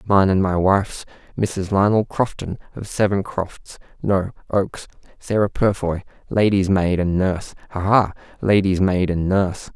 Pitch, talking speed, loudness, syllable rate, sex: 95 Hz, 130 wpm, -20 LUFS, 4.5 syllables/s, male